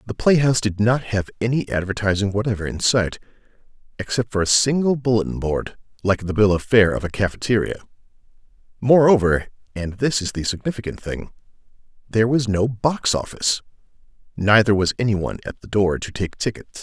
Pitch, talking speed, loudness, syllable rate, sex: 105 Hz, 155 wpm, -20 LUFS, 5.8 syllables/s, male